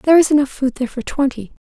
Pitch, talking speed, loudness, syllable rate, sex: 270 Hz, 250 wpm, -17 LUFS, 7.3 syllables/s, female